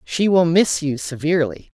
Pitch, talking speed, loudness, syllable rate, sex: 160 Hz, 165 wpm, -18 LUFS, 4.9 syllables/s, female